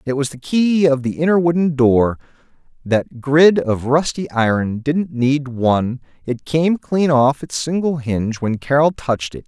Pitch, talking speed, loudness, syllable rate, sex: 140 Hz, 165 wpm, -17 LUFS, 4.4 syllables/s, male